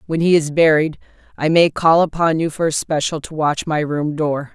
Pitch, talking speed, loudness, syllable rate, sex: 155 Hz, 225 wpm, -17 LUFS, 5.0 syllables/s, female